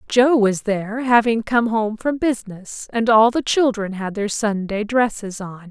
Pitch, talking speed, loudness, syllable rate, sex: 220 Hz, 180 wpm, -19 LUFS, 4.4 syllables/s, female